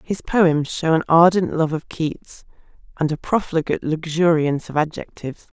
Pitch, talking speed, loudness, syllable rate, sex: 160 Hz, 150 wpm, -19 LUFS, 4.9 syllables/s, female